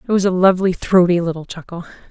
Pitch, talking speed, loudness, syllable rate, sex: 180 Hz, 200 wpm, -15 LUFS, 6.7 syllables/s, female